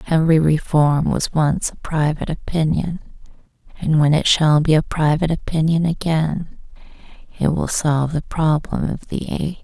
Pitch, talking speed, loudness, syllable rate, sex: 155 Hz, 150 wpm, -19 LUFS, 4.9 syllables/s, female